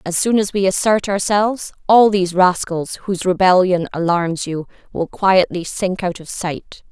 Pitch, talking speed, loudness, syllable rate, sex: 185 Hz, 165 wpm, -17 LUFS, 4.7 syllables/s, female